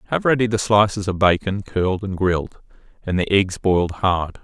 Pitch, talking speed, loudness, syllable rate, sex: 100 Hz, 190 wpm, -19 LUFS, 5.3 syllables/s, male